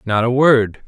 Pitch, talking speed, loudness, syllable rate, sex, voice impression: 120 Hz, 205 wpm, -15 LUFS, 4.1 syllables/s, male, masculine, adult-like, tensed, powerful, slightly bright, clear, raspy, cool, intellectual, slightly friendly, wild, lively, slightly sharp